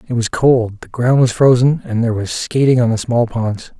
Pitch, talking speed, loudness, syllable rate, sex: 120 Hz, 235 wpm, -15 LUFS, 5.0 syllables/s, male